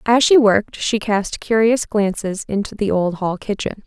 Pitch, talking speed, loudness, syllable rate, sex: 210 Hz, 185 wpm, -18 LUFS, 4.6 syllables/s, female